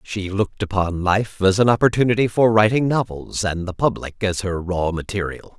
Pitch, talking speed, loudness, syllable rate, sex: 100 Hz, 185 wpm, -20 LUFS, 5.1 syllables/s, male